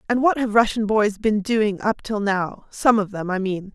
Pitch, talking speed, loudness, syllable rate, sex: 210 Hz, 240 wpm, -21 LUFS, 4.5 syllables/s, female